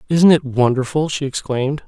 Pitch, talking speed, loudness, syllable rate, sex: 140 Hz, 160 wpm, -17 LUFS, 5.5 syllables/s, male